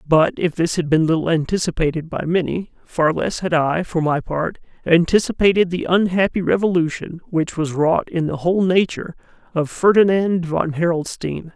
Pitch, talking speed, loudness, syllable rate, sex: 170 Hz, 160 wpm, -19 LUFS, 5.0 syllables/s, male